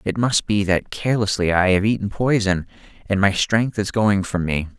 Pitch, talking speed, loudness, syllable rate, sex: 100 Hz, 200 wpm, -20 LUFS, 5.0 syllables/s, male